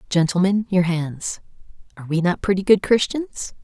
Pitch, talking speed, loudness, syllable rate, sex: 185 Hz, 150 wpm, -20 LUFS, 5.0 syllables/s, female